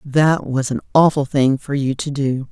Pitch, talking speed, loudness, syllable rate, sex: 140 Hz, 215 wpm, -18 LUFS, 4.4 syllables/s, female